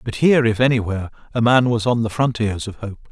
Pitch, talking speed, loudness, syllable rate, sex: 115 Hz, 230 wpm, -18 LUFS, 6.4 syllables/s, male